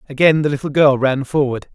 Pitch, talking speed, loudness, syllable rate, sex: 140 Hz, 205 wpm, -16 LUFS, 5.9 syllables/s, male